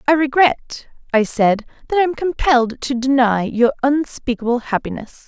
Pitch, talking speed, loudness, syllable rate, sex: 270 Hz, 150 wpm, -17 LUFS, 4.9 syllables/s, female